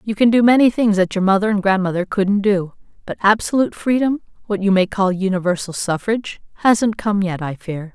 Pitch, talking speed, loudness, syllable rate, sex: 200 Hz, 180 wpm, -18 LUFS, 5.6 syllables/s, female